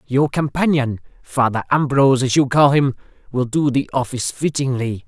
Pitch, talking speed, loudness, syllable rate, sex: 135 Hz, 155 wpm, -18 LUFS, 5.1 syllables/s, male